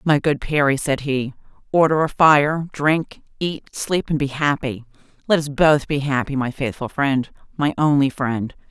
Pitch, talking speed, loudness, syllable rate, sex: 145 Hz, 170 wpm, -20 LUFS, 4.3 syllables/s, female